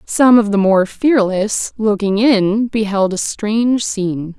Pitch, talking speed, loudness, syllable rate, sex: 210 Hz, 150 wpm, -15 LUFS, 3.8 syllables/s, female